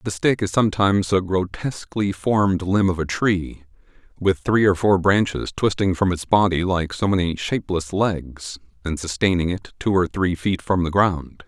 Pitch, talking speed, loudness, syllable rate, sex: 95 Hz, 185 wpm, -21 LUFS, 4.8 syllables/s, male